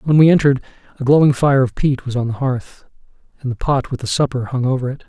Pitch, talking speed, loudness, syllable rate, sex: 130 Hz, 250 wpm, -17 LUFS, 6.5 syllables/s, male